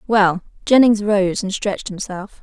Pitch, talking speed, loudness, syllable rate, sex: 200 Hz, 150 wpm, -17 LUFS, 4.3 syllables/s, female